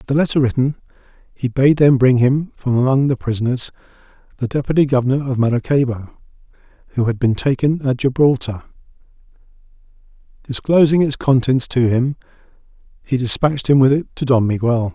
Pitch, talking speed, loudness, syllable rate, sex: 130 Hz, 145 wpm, -17 LUFS, 5.7 syllables/s, male